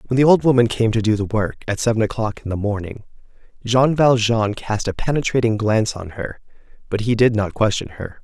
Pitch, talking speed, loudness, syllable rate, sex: 110 Hz, 210 wpm, -19 LUFS, 5.7 syllables/s, male